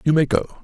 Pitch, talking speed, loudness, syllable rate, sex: 150 Hz, 285 wpm, -19 LUFS, 6.1 syllables/s, male